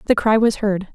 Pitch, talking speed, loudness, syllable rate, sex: 210 Hz, 255 wpm, -18 LUFS, 5.6 syllables/s, female